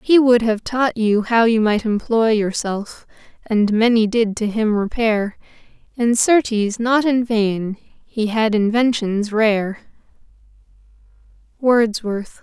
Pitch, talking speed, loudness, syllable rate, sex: 225 Hz, 125 wpm, -18 LUFS, 3.7 syllables/s, female